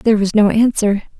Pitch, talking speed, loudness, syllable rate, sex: 210 Hz, 200 wpm, -14 LUFS, 5.9 syllables/s, female